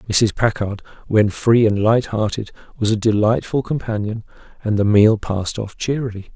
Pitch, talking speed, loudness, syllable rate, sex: 110 Hz, 150 wpm, -18 LUFS, 5.0 syllables/s, male